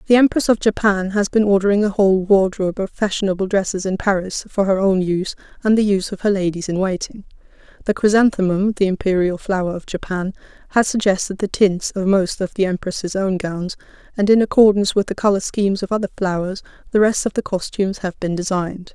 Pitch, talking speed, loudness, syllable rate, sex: 195 Hz, 200 wpm, -18 LUFS, 5.6 syllables/s, female